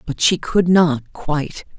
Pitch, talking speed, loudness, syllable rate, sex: 160 Hz, 170 wpm, -18 LUFS, 3.9 syllables/s, female